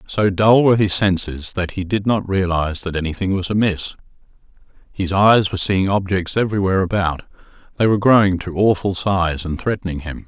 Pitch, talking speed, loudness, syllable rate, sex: 95 Hz, 170 wpm, -18 LUFS, 5.7 syllables/s, male